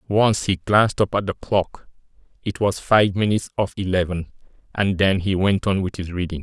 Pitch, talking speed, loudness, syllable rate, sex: 95 Hz, 175 wpm, -21 LUFS, 5.1 syllables/s, male